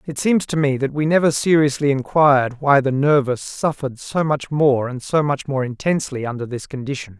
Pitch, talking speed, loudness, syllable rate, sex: 140 Hz, 200 wpm, -19 LUFS, 5.4 syllables/s, male